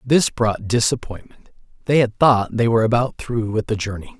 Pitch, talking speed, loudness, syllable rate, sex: 115 Hz, 185 wpm, -19 LUFS, 5.1 syllables/s, male